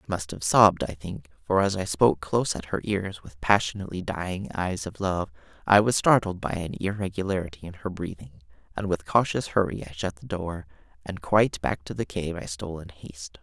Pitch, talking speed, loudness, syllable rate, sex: 90 Hz, 210 wpm, -26 LUFS, 5.5 syllables/s, male